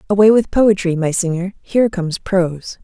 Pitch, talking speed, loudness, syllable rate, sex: 190 Hz, 170 wpm, -16 LUFS, 5.5 syllables/s, female